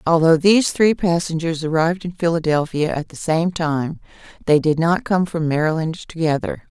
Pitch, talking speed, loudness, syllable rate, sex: 165 Hz, 160 wpm, -19 LUFS, 5.1 syllables/s, female